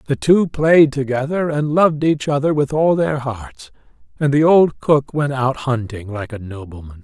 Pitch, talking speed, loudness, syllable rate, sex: 140 Hz, 190 wpm, -17 LUFS, 4.6 syllables/s, male